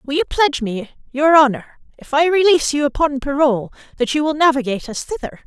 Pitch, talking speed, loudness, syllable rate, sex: 285 Hz, 200 wpm, -17 LUFS, 6.2 syllables/s, female